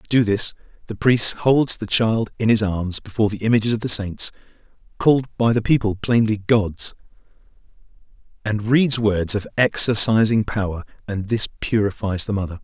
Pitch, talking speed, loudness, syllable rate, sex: 110 Hz, 160 wpm, -20 LUFS, 4.4 syllables/s, male